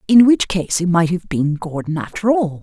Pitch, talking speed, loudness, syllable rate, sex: 180 Hz, 230 wpm, -17 LUFS, 4.9 syllables/s, female